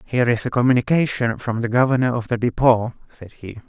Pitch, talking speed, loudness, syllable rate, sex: 120 Hz, 195 wpm, -19 LUFS, 5.9 syllables/s, male